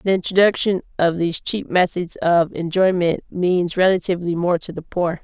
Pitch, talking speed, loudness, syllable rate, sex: 175 Hz, 160 wpm, -19 LUFS, 5.1 syllables/s, female